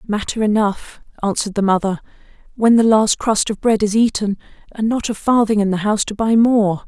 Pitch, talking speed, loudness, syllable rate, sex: 210 Hz, 200 wpm, -17 LUFS, 5.5 syllables/s, female